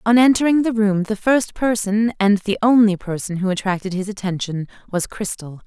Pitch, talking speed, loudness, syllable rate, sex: 205 Hz, 180 wpm, -19 LUFS, 5.2 syllables/s, female